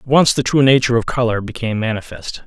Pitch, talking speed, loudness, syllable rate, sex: 125 Hz, 220 wpm, -16 LUFS, 6.6 syllables/s, male